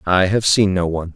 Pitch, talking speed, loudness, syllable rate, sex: 95 Hz, 260 wpm, -16 LUFS, 5.8 syllables/s, male